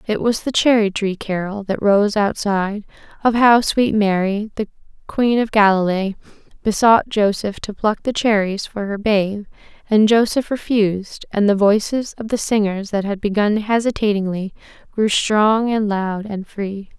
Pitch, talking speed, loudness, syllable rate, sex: 210 Hz, 160 wpm, -18 LUFS, 4.4 syllables/s, female